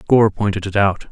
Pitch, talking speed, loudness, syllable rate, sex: 100 Hz, 215 wpm, -17 LUFS, 5.3 syllables/s, male